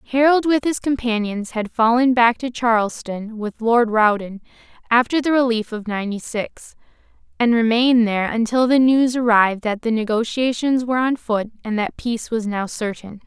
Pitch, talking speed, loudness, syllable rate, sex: 230 Hz, 165 wpm, -19 LUFS, 5.1 syllables/s, female